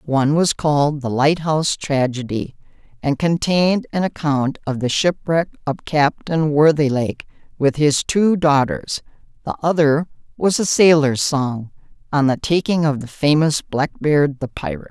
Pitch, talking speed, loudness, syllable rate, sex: 150 Hz, 145 wpm, -18 LUFS, 4.6 syllables/s, female